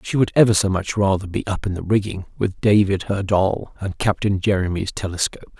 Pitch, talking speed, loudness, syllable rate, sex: 100 Hz, 205 wpm, -20 LUFS, 5.5 syllables/s, male